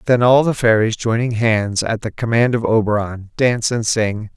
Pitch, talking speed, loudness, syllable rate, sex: 115 Hz, 195 wpm, -17 LUFS, 4.9 syllables/s, male